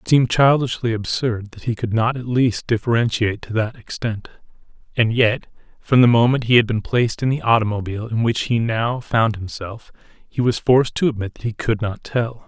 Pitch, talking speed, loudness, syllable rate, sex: 115 Hz, 200 wpm, -19 LUFS, 5.4 syllables/s, male